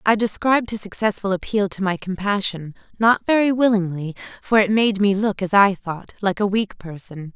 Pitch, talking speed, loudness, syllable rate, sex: 200 Hz, 180 wpm, -20 LUFS, 5.2 syllables/s, female